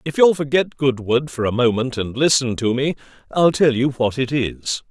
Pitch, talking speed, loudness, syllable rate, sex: 130 Hz, 210 wpm, -19 LUFS, 4.8 syllables/s, male